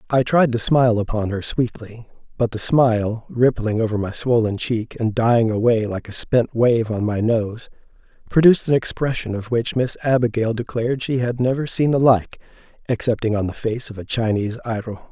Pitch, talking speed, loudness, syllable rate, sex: 115 Hz, 185 wpm, -20 LUFS, 5.2 syllables/s, male